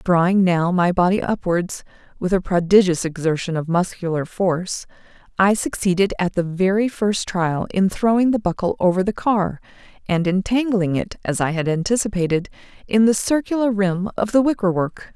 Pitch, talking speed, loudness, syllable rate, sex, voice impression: 190 Hz, 160 wpm, -20 LUFS, 5.0 syllables/s, female, feminine, adult-like, powerful, bright, soft, clear, fluent, intellectual, friendly, elegant, slightly strict, slightly sharp